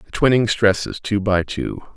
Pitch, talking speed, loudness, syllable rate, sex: 100 Hz, 185 wpm, -19 LUFS, 4.3 syllables/s, male